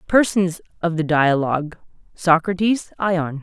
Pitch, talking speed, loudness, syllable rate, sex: 170 Hz, 105 wpm, -19 LUFS, 4.1 syllables/s, male